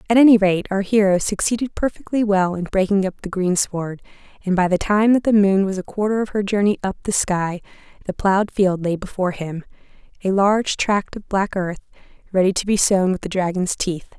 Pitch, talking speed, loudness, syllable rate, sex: 195 Hz, 205 wpm, -19 LUFS, 5.6 syllables/s, female